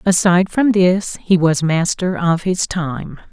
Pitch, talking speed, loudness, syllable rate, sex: 180 Hz, 165 wpm, -16 LUFS, 3.9 syllables/s, female